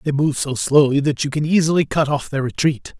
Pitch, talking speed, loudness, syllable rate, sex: 145 Hz, 240 wpm, -18 LUFS, 5.6 syllables/s, male